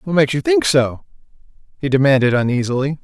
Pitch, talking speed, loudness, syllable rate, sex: 130 Hz, 160 wpm, -16 LUFS, 6.3 syllables/s, male